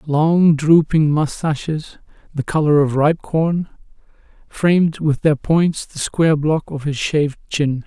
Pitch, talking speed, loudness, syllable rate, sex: 155 Hz, 145 wpm, -17 LUFS, 4.0 syllables/s, male